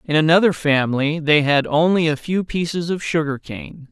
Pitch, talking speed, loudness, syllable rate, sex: 155 Hz, 170 wpm, -18 LUFS, 5.3 syllables/s, male